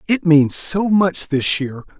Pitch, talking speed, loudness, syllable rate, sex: 170 Hz, 180 wpm, -16 LUFS, 3.5 syllables/s, male